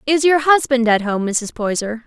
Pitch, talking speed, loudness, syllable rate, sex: 250 Hz, 205 wpm, -16 LUFS, 4.8 syllables/s, female